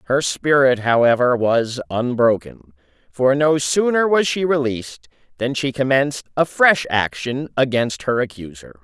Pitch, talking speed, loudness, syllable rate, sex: 135 Hz, 135 wpm, -18 LUFS, 4.4 syllables/s, male